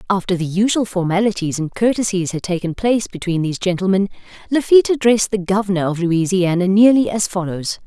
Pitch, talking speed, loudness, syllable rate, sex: 195 Hz, 160 wpm, -17 LUFS, 6.1 syllables/s, female